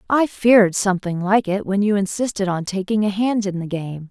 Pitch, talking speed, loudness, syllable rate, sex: 200 Hz, 220 wpm, -19 LUFS, 5.3 syllables/s, female